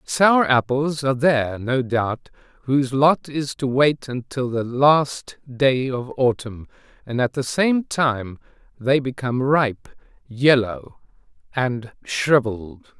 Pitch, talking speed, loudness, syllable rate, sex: 130 Hz, 130 wpm, -20 LUFS, 3.6 syllables/s, male